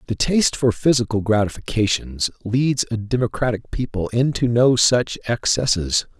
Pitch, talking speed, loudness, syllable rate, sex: 115 Hz, 125 wpm, -20 LUFS, 4.8 syllables/s, male